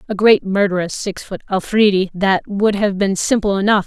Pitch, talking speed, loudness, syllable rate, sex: 200 Hz, 170 wpm, -16 LUFS, 5.0 syllables/s, female